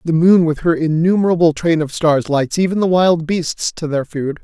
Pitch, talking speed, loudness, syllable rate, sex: 165 Hz, 215 wpm, -15 LUFS, 4.9 syllables/s, male